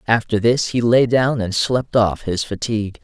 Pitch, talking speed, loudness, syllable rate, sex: 110 Hz, 200 wpm, -18 LUFS, 4.6 syllables/s, male